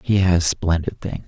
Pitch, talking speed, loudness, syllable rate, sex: 90 Hz, 190 wpm, -20 LUFS, 4.3 syllables/s, male